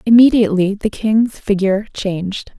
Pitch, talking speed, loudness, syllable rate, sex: 205 Hz, 115 wpm, -16 LUFS, 5.1 syllables/s, female